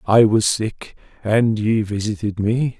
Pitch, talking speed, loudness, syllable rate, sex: 110 Hz, 150 wpm, -19 LUFS, 3.8 syllables/s, male